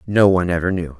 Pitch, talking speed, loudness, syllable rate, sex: 90 Hz, 240 wpm, -17 LUFS, 7.1 syllables/s, male